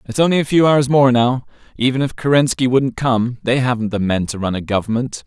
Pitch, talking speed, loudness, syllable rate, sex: 125 Hz, 230 wpm, -17 LUFS, 5.6 syllables/s, male